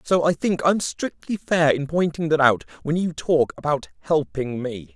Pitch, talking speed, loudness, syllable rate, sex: 150 Hz, 195 wpm, -22 LUFS, 4.5 syllables/s, male